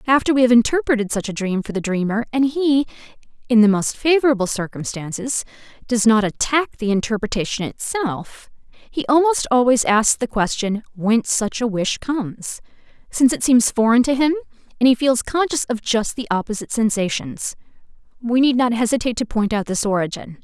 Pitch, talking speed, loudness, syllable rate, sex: 235 Hz, 170 wpm, -19 LUFS, 5.4 syllables/s, female